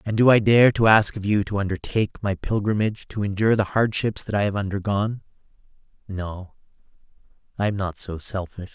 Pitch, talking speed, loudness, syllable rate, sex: 100 Hz, 180 wpm, -22 LUFS, 5.8 syllables/s, male